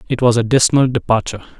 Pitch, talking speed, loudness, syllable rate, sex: 120 Hz, 190 wpm, -15 LUFS, 7.0 syllables/s, male